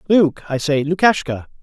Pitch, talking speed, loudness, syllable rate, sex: 155 Hz, 150 wpm, -18 LUFS, 4.5 syllables/s, male